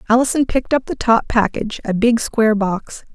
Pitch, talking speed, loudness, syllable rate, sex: 225 Hz, 190 wpm, -17 LUFS, 5.7 syllables/s, female